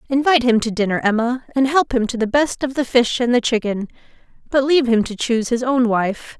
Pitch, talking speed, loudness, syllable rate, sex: 245 Hz, 235 wpm, -18 LUFS, 5.8 syllables/s, female